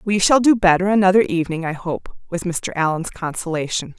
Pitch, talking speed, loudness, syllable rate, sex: 180 Hz, 180 wpm, -18 LUFS, 5.7 syllables/s, female